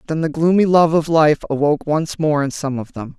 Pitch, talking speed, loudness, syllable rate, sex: 155 Hz, 245 wpm, -17 LUFS, 5.4 syllables/s, female